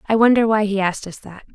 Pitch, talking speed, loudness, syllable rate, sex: 210 Hz, 270 wpm, -17 LUFS, 7.1 syllables/s, female